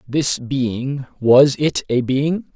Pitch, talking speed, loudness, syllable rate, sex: 135 Hz, 115 wpm, -18 LUFS, 2.7 syllables/s, male